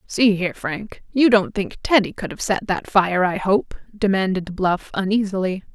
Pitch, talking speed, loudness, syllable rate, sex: 195 Hz, 180 wpm, -20 LUFS, 4.6 syllables/s, female